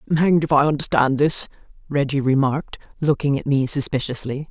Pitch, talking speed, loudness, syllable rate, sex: 140 Hz, 160 wpm, -20 LUFS, 6.0 syllables/s, female